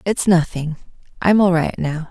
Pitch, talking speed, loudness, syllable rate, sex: 175 Hz, 170 wpm, -18 LUFS, 4.5 syllables/s, female